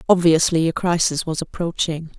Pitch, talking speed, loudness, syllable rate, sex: 165 Hz, 140 wpm, -19 LUFS, 5.1 syllables/s, female